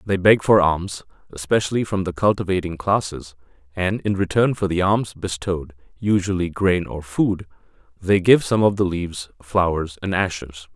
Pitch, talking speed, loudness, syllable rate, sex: 90 Hz, 160 wpm, -20 LUFS, 4.6 syllables/s, male